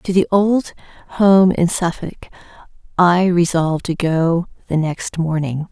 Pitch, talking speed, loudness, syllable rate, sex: 175 Hz, 135 wpm, -17 LUFS, 4.1 syllables/s, female